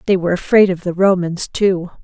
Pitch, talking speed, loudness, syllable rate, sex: 185 Hz, 205 wpm, -16 LUFS, 5.7 syllables/s, female